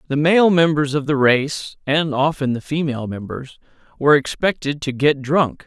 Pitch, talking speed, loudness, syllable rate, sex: 145 Hz, 170 wpm, -18 LUFS, 4.8 syllables/s, male